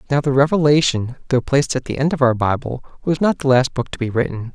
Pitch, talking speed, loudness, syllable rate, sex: 135 Hz, 250 wpm, -18 LUFS, 6.2 syllables/s, male